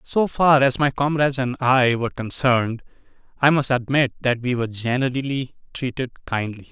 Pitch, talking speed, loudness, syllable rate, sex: 130 Hz, 160 wpm, -21 LUFS, 5.2 syllables/s, male